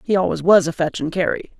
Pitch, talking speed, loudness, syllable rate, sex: 175 Hz, 265 wpm, -18 LUFS, 6.2 syllables/s, female